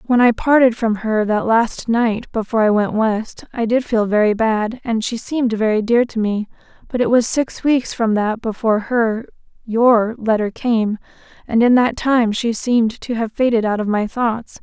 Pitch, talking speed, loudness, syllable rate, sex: 225 Hz, 195 wpm, -17 LUFS, 4.6 syllables/s, female